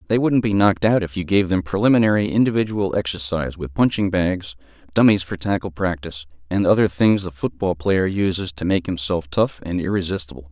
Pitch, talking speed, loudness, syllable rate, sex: 90 Hz, 185 wpm, -20 LUFS, 5.8 syllables/s, male